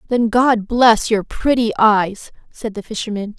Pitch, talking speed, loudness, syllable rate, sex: 220 Hz, 160 wpm, -16 LUFS, 4.1 syllables/s, female